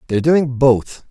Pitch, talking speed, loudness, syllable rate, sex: 135 Hz, 165 wpm, -15 LUFS, 4.5 syllables/s, male